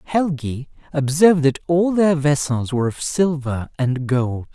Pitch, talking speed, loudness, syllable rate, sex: 145 Hz, 145 wpm, -19 LUFS, 4.3 syllables/s, male